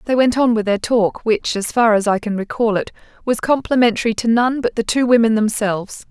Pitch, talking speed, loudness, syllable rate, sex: 225 Hz, 225 wpm, -17 LUFS, 5.5 syllables/s, female